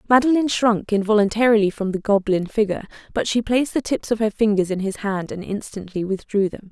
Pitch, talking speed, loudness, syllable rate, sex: 210 Hz, 195 wpm, -21 LUFS, 6.1 syllables/s, female